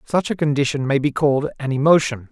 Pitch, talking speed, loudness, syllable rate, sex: 145 Hz, 205 wpm, -19 LUFS, 6.3 syllables/s, male